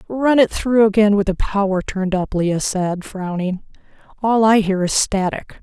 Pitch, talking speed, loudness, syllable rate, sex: 200 Hz, 180 wpm, -18 LUFS, 4.6 syllables/s, female